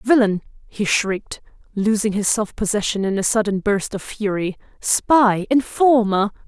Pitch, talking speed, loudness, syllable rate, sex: 210 Hz, 140 wpm, -19 LUFS, 4.4 syllables/s, female